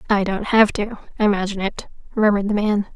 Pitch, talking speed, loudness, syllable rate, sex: 205 Hz, 160 wpm, -20 LUFS, 6.3 syllables/s, female